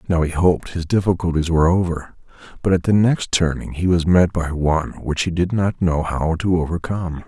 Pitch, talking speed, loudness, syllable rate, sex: 85 Hz, 205 wpm, -19 LUFS, 5.4 syllables/s, male